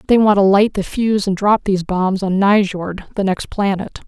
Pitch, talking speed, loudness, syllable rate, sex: 195 Hz, 220 wpm, -16 LUFS, 4.8 syllables/s, female